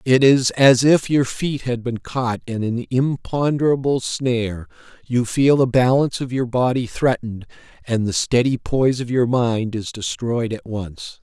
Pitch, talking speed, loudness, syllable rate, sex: 125 Hz, 170 wpm, -19 LUFS, 4.4 syllables/s, male